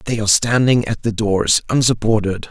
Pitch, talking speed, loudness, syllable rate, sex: 110 Hz, 170 wpm, -16 LUFS, 5.3 syllables/s, male